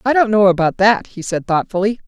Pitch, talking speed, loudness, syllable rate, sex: 200 Hz, 230 wpm, -16 LUFS, 5.7 syllables/s, female